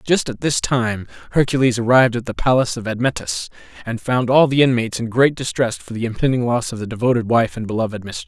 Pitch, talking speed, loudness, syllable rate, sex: 120 Hz, 215 wpm, -18 LUFS, 6.4 syllables/s, male